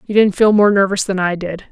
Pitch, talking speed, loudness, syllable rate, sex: 195 Hz, 280 wpm, -14 LUFS, 5.7 syllables/s, female